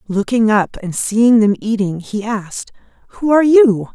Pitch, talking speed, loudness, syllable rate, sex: 220 Hz, 165 wpm, -14 LUFS, 4.6 syllables/s, female